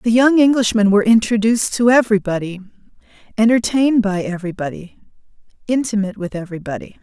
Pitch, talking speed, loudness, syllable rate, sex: 215 Hz, 110 wpm, -16 LUFS, 6.7 syllables/s, female